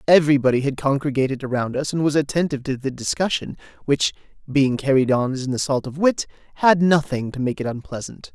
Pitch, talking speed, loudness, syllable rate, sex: 140 Hz, 185 wpm, -21 LUFS, 6.1 syllables/s, male